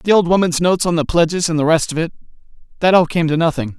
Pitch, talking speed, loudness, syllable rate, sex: 165 Hz, 255 wpm, -16 LUFS, 7.1 syllables/s, male